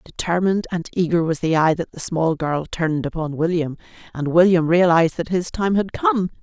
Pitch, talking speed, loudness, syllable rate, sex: 170 Hz, 195 wpm, -20 LUFS, 5.4 syllables/s, female